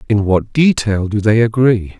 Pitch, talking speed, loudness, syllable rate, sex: 110 Hz, 180 wpm, -14 LUFS, 4.4 syllables/s, male